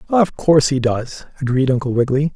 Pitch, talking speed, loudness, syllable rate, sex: 140 Hz, 180 wpm, -17 LUFS, 5.9 syllables/s, male